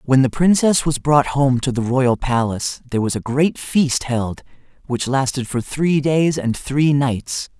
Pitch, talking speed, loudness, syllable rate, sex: 135 Hz, 190 wpm, -18 LUFS, 4.2 syllables/s, male